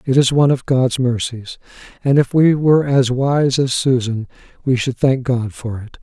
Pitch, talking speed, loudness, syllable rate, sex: 130 Hz, 200 wpm, -16 LUFS, 4.7 syllables/s, male